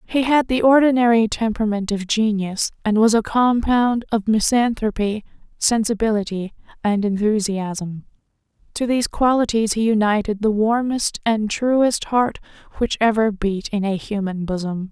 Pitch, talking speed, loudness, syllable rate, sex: 220 Hz, 135 wpm, -19 LUFS, 4.6 syllables/s, female